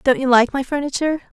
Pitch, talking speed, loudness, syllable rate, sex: 265 Hz, 215 wpm, -18 LUFS, 6.5 syllables/s, female